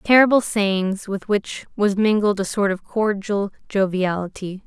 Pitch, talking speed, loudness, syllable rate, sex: 200 Hz, 140 wpm, -20 LUFS, 4.2 syllables/s, female